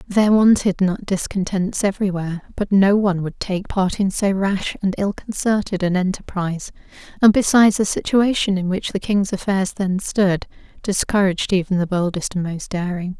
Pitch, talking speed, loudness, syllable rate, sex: 190 Hz, 175 wpm, -19 LUFS, 5.2 syllables/s, female